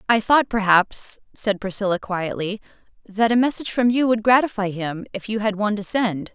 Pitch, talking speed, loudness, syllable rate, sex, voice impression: 210 Hz, 190 wpm, -21 LUFS, 5.3 syllables/s, female, very feminine, slightly young, slightly adult-like, thin, tensed, powerful, bright, hard, very clear, very fluent, slightly raspy, slightly cute, cool, intellectual, very refreshing, sincere, slightly calm, very friendly, reassuring, unique, elegant, slightly wild, slightly sweet, very lively, slightly strict, intense, slightly sharp